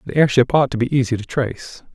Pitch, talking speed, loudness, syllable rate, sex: 130 Hz, 245 wpm, -18 LUFS, 6.4 syllables/s, male